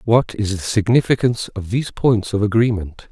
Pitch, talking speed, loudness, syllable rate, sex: 110 Hz, 175 wpm, -18 LUFS, 5.4 syllables/s, male